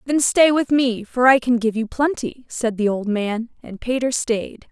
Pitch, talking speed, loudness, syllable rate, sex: 240 Hz, 215 wpm, -19 LUFS, 4.3 syllables/s, female